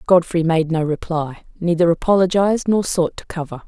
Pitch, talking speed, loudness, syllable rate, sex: 170 Hz, 145 wpm, -18 LUFS, 5.3 syllables/s, female